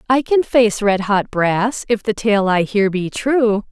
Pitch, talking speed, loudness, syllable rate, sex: 215 Hz, 210 wpm, -17 LUFS, 3.7 syllables/s, female